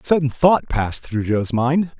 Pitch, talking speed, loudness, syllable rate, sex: 130 Hz, 210 wpm, -19 LUFS, 4.9 syllables/s, male